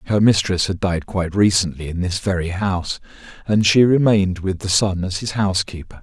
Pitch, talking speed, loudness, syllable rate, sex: 95 Hz, 190 wpm, -19 LUFS, 5.6 syllables/s, male